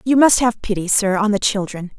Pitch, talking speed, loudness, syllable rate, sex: 210 Hz, 240 wpm, -17 LUFS, 5.4 syllables/s, female